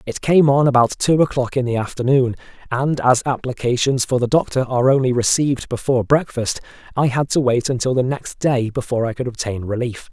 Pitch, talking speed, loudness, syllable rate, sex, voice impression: 125 Hz, 195 wpm, -18 LUFS, 5.7 syllables/s, male, masculine, adult-like, tensed, powerful, soft, slightly muffled, slightly raspy, calm, slightly mature, friendly, reassuring, slightly wild, kind, modest